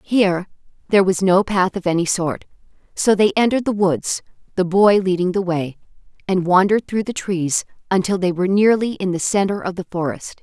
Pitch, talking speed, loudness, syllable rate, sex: 190 Hz, 190 wpm, -18 LUFS, 5.5 syllables/s, female